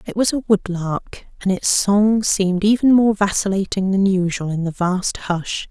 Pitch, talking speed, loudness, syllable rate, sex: 195 Hz, 180 wpm, -18 LUFS, 4.5 syllables/s, female